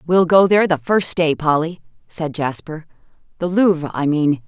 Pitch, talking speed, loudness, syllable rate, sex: 160 Hz, 175 wpm, -17 LUFS, 4.9 syllables/s, female